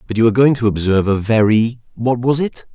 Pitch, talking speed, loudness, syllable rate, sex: 115 Hz, 240 wpm, -16 LUFS, 6.3 syllables/s, male